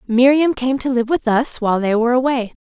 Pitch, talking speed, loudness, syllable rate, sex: 250 Hz, 230 wpm, -17 LUFS, 5.8 syllables/s, female